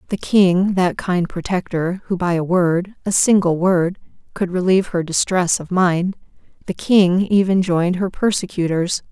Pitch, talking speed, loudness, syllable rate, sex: 180 Hz, 160 wpm, -18 LUFS, 4.5 syllables/s, female